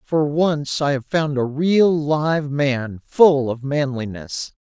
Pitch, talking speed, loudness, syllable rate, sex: 145 Hz, 155 wpm, -19 LUFS, 3.2 syllables/s, male